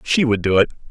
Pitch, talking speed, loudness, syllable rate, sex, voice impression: 115 Hz, 265 wpm, -17 LUFS, 6.1 syllables/s, male, masculine, adult-like, thick, tensed, slightly powerful, hard, fluent, slightly cool, intellectual, slightly friendly, unique, wild, lively, slightly kind